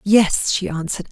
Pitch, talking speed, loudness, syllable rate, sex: 190 Hz, 160 wpm, -19 LUFS, 5.0 syllables/s, female